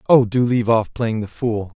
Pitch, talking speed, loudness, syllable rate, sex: 115 Hz, 235 wpm, -19 LUFS, 5.2 syllables/s, male